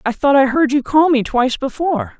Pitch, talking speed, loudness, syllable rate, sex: 280 Hz, 245 wpm, -15 LUFS, 5.8 syllables/s, female